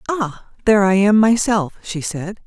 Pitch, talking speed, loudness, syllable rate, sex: 200 Hz, 170 wpm, -17 LUFS, 4.5 syllables/s, female